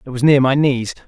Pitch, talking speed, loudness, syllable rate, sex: 135 Hz, 280 wpm, -15 LUFS, 5.8 syllables/s, male